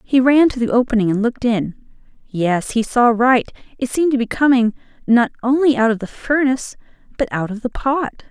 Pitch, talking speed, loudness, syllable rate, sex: 240 Hz, 200 wpm, -17 LUFS, 5.6 syllables/s, female